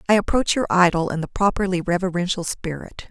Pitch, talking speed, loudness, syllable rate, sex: 185 Hz, 175 wpm, -21 LUFS, 5.9 syllables/s, female